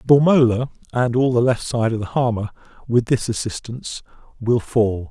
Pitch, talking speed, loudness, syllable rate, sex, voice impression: 120 Hz, 175 wpm, -20 LUFS, 5.2 syllables/s, male, very masculine, adult-like, slightly middle-aged, slightly thick, slightly relaxed, slightly weak, slightly dark, slightly soft, slightly muffled, slightly fluent, slightly cool, very intellectual, slightly refreshing, sincere, slightly calm, slightly mature, slightly friendly, slightly reassuring, slightly unique, slightly elegant, sweet, kind, modest